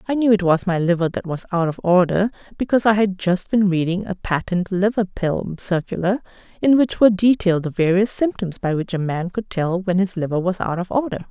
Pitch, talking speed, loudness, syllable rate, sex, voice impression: 190 Hz, 225 wpm, -20 LUFS, 5.6 syllables/s, female, feminine, adult-like, slightly fluent, slightly sincere, slightly friendly, slightly sweet